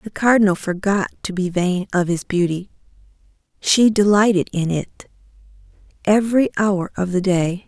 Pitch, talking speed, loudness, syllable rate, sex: 190 Hz, 140 wpm, -18 LUFS, 4.9 syllables/s, female